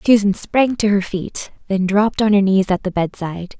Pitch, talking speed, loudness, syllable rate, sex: 200 Hz, 215 wpm, -18 LUFS, 5.2 syllables/s, female